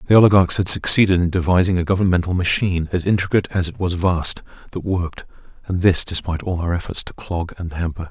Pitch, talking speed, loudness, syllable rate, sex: 90 Hz, 195 wpm, -19 LUFS, 6.4 syllables/s, male